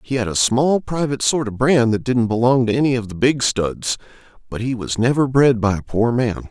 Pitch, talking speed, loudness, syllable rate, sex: 120 Hz, 240 wpm, -18 LUFS, 5.3 syllables/s, male